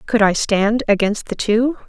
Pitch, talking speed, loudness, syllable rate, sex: 225 Hz, 190 wpm, -17 LUFS, 4.4 syllables/s, female